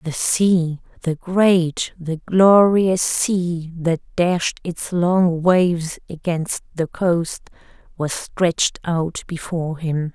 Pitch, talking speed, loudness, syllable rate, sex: 170 Hz, 105 wpm, -19 LUFS, 3.0 syllables/s, female